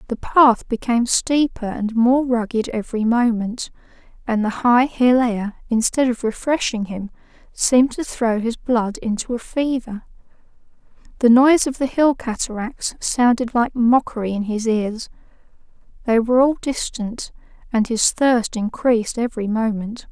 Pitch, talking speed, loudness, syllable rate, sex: 235 Hz, 145 wpm, -19 LUFS, 4.5 syllables/s, female